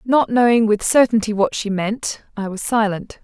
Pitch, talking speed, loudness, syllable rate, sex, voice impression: 220 Hz, 185 wpm, -18 LUFS, 4.7 syllables/s, female, feminine, adult-like, slightly fluent, intellectual, slightly elegant